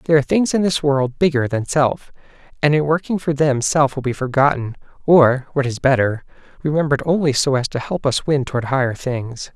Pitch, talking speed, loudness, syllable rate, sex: 140 Hz, 195 wpm, -18 LUFS, 5.6 syllables/s, male